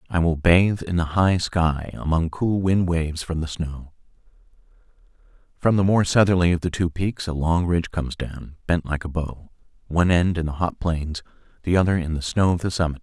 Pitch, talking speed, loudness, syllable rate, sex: 85 Hz, 205 wpm, -22 LUFS, 5.3 syllables/s, male